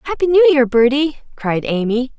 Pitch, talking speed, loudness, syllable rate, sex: 270 Hz, 165 wpm, -15 LUFS, 4.9 syllables/s, female